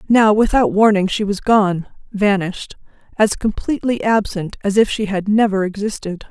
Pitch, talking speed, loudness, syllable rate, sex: 205 Hz, 150 wpm, -17 LUFS, 5.0 syllables/s, female